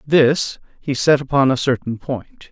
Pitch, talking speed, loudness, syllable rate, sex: 135 Hz, 165 wpm, -18 LUFS, 4.1 syllables/s, male